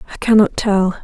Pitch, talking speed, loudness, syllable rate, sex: 205 Hz, 175 wpm, -15 LUFS, 5.6 syllables/s, female